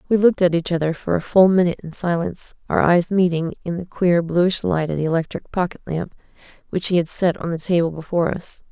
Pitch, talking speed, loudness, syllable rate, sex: 170 Hz, 220 wpm, -20 LUFS, 6.0 syllables/s, female